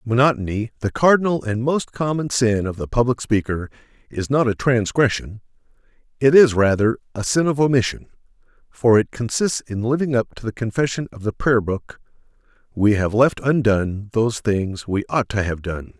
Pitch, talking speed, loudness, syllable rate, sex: 115 Hz, 170 wpm, -20 LUFS, 5.1 syllables/s, male